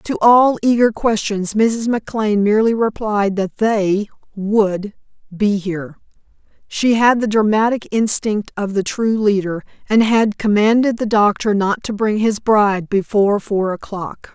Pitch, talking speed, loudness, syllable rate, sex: 210 Hz, 145 wpm, -16 LUFS, 4.4 syllables/s, female